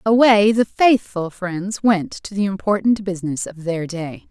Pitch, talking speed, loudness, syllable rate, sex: 195 Hz, 165 wpm, -19 LUFS, 4.3 syllables/s, female